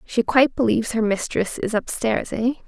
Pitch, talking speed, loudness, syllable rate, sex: 225 Hz, 200 wpm, -21 LUFS, 5.4 syllables/s, female